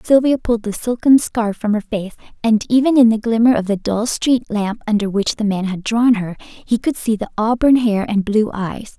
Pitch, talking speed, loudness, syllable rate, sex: 220 Hz, 225 wpm, -17 LUFS, 5.0 syllables/s, female